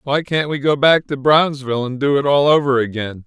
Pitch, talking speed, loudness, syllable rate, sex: 140 Hz, 240 wpm, -16 LUFS, 5.4 syllables/s, male